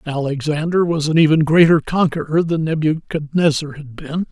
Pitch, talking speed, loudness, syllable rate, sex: 155 Hz, 140 wpm, -17 LUFS, 5.0 syllables/s, male